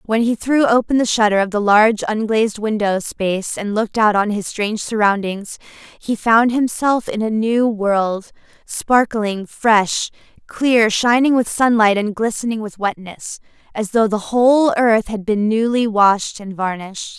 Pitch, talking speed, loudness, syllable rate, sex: 220 Hz, 165 wpm, -17 LUFS, 4.4 syllables/s, female